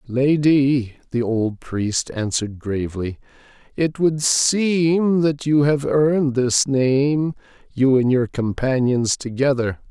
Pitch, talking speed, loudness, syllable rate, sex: 135 Hz, 120 wpm, -19 LUFS, 3.5 syllables/s, male